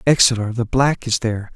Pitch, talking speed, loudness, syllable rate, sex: 120 Hz, 195 wpm, -18 LUFS, 6.2 syllables/s, male